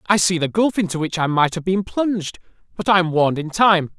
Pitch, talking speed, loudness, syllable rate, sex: 180 Hz, 255 wpm, -19 LUFS, 5.8 syllables/s, male